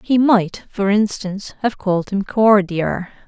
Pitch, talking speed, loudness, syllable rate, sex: 200 Hz, 145 wpm, -18 LUFS, 4.1 syllables/s, female